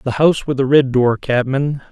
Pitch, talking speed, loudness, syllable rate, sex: 135 Hz, 220 wpm, -16 LUFS, 5.3 syllables/s, male